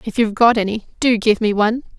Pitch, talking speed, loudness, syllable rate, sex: 220 Hz, 240 wpm, -17 LUFS, 6.7 syllables/s, female